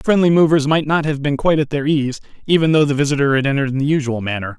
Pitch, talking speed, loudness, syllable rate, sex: 145 Hz, 275 wpm, -16 LUFS, 7.4 syllables/s, male